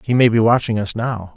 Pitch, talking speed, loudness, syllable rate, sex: 115 Hz, 265 wpm, -17 LUFS, 5.6 syllables/s, male